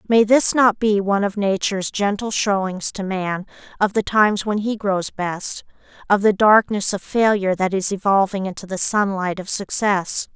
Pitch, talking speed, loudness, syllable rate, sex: 200 Hz, 180 wpm, -19 LUFS, 4.8 syllables/s, female